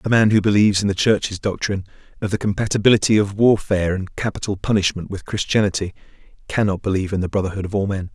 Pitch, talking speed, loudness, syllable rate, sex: 100 Hz, 190 wpm, -19 LUFS, 6.8 syllables/s, male